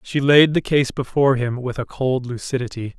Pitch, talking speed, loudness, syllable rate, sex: 130 Hz, 200 wpm, -19 LUFS, 5.2 syllables/s, male